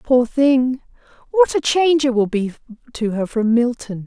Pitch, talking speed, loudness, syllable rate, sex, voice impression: 250 Hz, 175 wpm, -18 LUFS, 4.6 syllables/s, female, feminine, middle-aged, tensed, powerful, slightly hard, slightly halting, intellectual, friendly, lively, intense, slightly sharp